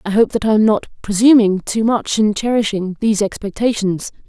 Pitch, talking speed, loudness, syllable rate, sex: 210 Hz, 180 wpm, -16 LUFS, 5.4 syllables/s, female